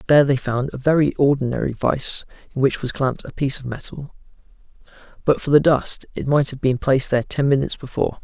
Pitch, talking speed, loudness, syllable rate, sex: 135 Hz, 205 wpm, -20 LUFS, 6.5 syllables/s, male